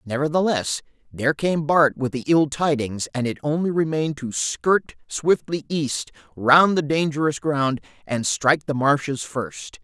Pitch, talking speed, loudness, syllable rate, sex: 145 Hz, 155 wpm, -22 LUFS, 4.4 syllables/s, male